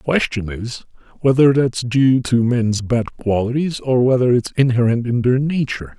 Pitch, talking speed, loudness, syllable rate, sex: 125 Hz, 170 wpm, -17 LUFS, 4.8 syllables/s, male